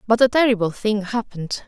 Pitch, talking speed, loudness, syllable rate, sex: 215 Hz, 180 wpm, -20 LUFS, 5.9 syllables/s, female